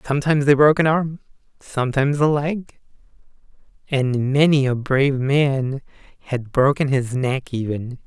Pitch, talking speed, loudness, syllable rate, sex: 140 Hz, 135 wpm, -19 LUFS, 4.9 syllables/s, male